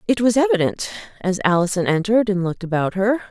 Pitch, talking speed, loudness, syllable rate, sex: 205 Hz, 180 wpm, -19 LUFS, 6.6 syllables/s, female